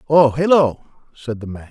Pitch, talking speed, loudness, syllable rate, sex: 130 Hz, 175 wpm, -16 LUFS, 4.7 syllables/s, male